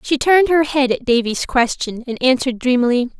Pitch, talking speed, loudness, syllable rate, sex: 260 Hz, 190 wpm, -16 LUFS, 5.7 syllables/s, female